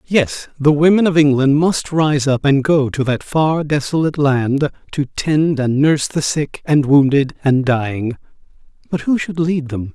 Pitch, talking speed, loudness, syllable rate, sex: 145 Hz, 180 wpm, -16 LUFS, 4.4 syllables/s, male